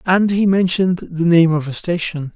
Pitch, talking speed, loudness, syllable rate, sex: 175 Hz, 205 wpm, -16 LUFS, 4.9 syllables/s, male